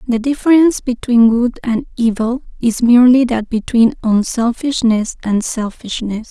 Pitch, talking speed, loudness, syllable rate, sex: 235 Hz, 125 wpm, -14 LUFS, 4.5 syllables/s, female